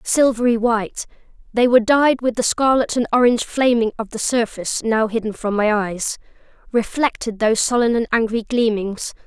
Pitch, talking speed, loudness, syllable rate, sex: 230 Hz, 160 wpm, -18 LUFS, 5.3 syllables/s, female